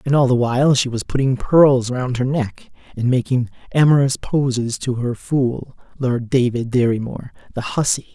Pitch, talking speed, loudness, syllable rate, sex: 125 Hz, 175 wpm, -18 LUFS, 4.7 syllables/s, male